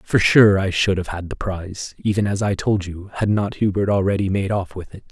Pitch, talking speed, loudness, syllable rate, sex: 95 Hz, 245 wpm, -20 LUFS, 5.4 syllables/s, male